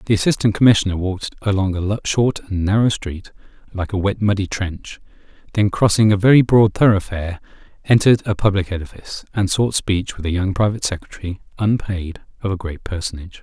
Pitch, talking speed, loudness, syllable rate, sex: 100 Hz, 170 wpm, -18 LUFS, 6.0 syllables/s, male